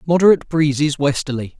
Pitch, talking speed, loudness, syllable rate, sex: 145 Hz, 115 wpm, -17 LUFS, 6.1 syllables/s, male